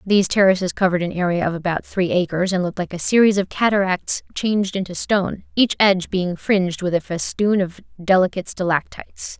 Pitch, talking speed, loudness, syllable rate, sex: 185 Hz, 185 wpm, -19 LUFS, 6.0 syllables/s, female